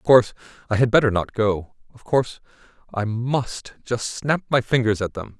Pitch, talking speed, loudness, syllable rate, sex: 115 Hz, 190 wpm, -22 LUFS, 5.1 syllables/s, male